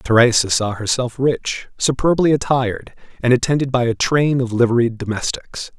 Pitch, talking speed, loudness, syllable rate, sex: 125 Hz, 145 wpm, -18 LUFS, 5.0 syllables/s, male